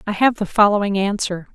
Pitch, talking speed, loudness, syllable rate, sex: 205 Hz, 195 wpm, -18 LUFS, 5.9 syllables/s, female